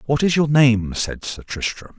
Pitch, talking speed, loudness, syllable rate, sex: 125 Hz, 210 wpm, -19 LUFS, 4.3 syllables/s, male